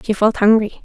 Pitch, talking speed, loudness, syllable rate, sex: 215 Hz, 215 wpm, -15 LUFS, 5.5 syllables/s, female